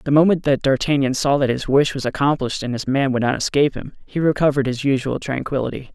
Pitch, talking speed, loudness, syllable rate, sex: 135 Hz, 220 wpm, -19 LUFS, 6.5 syllables/s, male